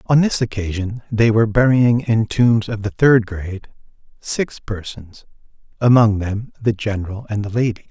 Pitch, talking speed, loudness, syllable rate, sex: 110 Hz, 160 wpm, -18 LUFS, 4.7 syllables/s, male